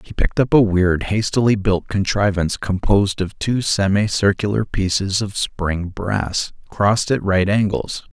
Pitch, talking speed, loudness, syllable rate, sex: 100 Hz, 145 wpm, -19 LUFS, 4.5 syllables/s, male